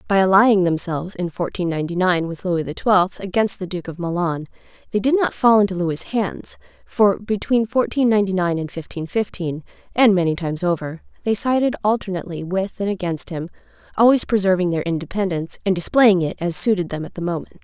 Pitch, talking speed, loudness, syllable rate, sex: 190 Hz, 185 wpm, -20 LUFS, 5.7 syllables/s, female